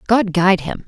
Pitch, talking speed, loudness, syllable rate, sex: 190 Hz, 205 wpm, -16 LUFS, 5.6 syllables/s, female